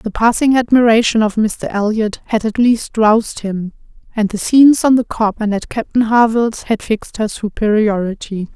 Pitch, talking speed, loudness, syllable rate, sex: 220 Hz, 175 wpm, -15 LUFS, 5.1 syllables/s, female